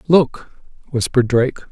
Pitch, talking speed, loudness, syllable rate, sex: 130 Hz, 105 wpm, -17 LUFS, 5.3 syllables/s, male